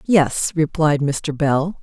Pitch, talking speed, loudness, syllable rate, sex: 155 Hz, 130 wpm, -19 LUFS, 2.9 syllables/s, female